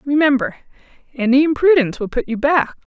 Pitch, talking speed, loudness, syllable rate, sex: 270 Hz, 145 wpm, -17 LUFS, 6.1 syllables/s, female